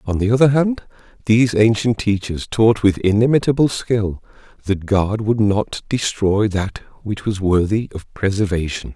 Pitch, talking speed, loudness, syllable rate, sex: 105 Hz, 145 wpm, -18 LUFS, 4.6 syllables/s, male